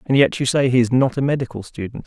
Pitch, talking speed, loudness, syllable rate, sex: 130 Hz, 290 wpm, -19 LUFS, 6.6 syllables/s, male